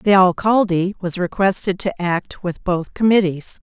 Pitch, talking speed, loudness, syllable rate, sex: 185 Hz, 145 wpm, -18 LUFS, 4.4 syllables/s, female